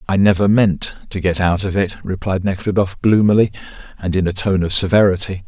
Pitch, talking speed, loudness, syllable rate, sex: 95 Hz, 185 wpm, -17 LUFS, 5.5 syllables/s, male